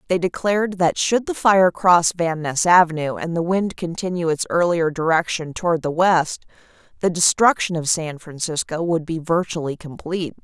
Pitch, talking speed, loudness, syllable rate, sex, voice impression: 170 Hz, 165 wpm, -20 LUFS, 4.9 syllables/s, female, feminine, adult-like, tensed, powerful, clear, fluent, intellectual, reassuring, elegant, lively, slightly sharp